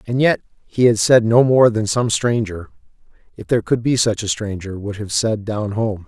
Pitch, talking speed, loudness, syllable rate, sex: 110 Hz, 215 wpm, -18 LUFS, 4.9 syllables/s, male